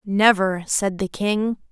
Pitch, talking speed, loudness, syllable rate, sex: 200 Hz, 140 wpm, -20 LUFS, 3.3 syllables/s, female